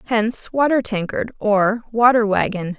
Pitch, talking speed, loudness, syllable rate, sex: 220 Hz, 130 wpm, -18 LUFS, 4.5 syllables/s, female